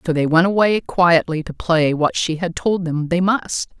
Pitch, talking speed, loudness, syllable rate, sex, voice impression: 165 Hz, 220 wpm, -18 LUFS, 4.5 syllables/s, female, feminine, adult-like, fluent, slightly cool, intellectual, slightly reassuring, elegant, slightly kind